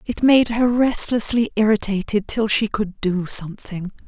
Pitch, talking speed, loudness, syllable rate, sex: 215 Hz, 145 wpm, -19 LUFS, 4.5 syllables/s, female